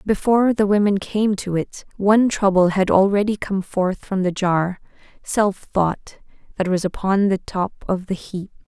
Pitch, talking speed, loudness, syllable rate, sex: 195 Hz, 165 wpm, -20 LUFS, 4.4 syllables/s, female